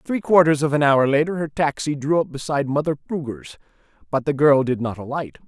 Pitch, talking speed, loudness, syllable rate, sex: 145 Hz, 210 wpm, -20 LUFS, 5.8 syllables/s, male